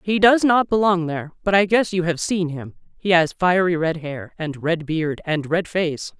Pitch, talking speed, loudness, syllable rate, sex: 175 Hz, 225 wpm, -20 LUFS, 4.6 syllables/s, female